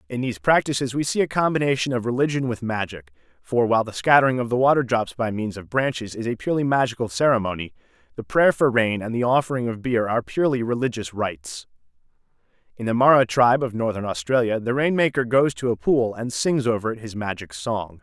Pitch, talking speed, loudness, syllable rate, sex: 120 Hz, 205 wpm, -22 LUFS, 6.2 syllables/s, male